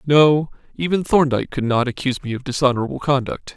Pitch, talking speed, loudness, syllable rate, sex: 135 Hz, 170 wpm, -19 LUFS, 6.3 syllables/s, male